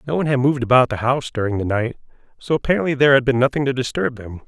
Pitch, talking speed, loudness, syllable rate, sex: 130 Hz, 255 wpm, -19 LUFS, 7.7 syllables/s, male